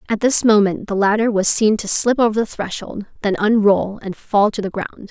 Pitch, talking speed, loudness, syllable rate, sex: 210 Hz, 225 wpm, -17 LUFS, 5.0 syllables/s, female